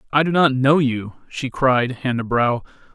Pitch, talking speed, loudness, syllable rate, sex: 130 Hz, 205 wpm, -19 LUFS, 4.4 syllables/s, male